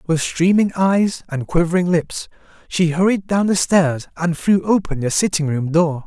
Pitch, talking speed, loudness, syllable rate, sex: 170 Hz, 180 wpm, -18 LUFS, 4.4 syllables/s, male